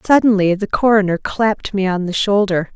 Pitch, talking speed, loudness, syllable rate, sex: 200 Hz, 175 wpm, -16 LUFS, 5.3 syllables/s, female